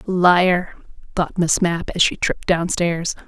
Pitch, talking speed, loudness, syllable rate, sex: 175 Hz, 145 wpm, -19 LUFS, 3.8 syllables/s, female